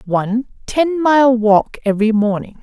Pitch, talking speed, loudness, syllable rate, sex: 235 Hz, 135 wpm, -15 LUFS, 4.4 syllables/s, female